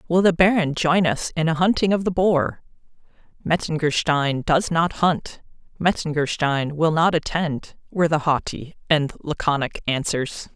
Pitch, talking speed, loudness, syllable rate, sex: 160 Hz, 135 wpm, -21 LUFS, 4.5 syllables/s, female